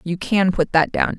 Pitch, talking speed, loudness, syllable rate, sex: 180 Hz, 255 wpm, -18 LUFS, 4.6 syllables/s, female